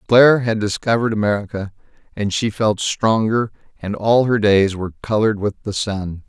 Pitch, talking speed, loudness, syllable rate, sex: 105 Hz, 160 wpm, -18 LUFS, 5.4 syllables/s, male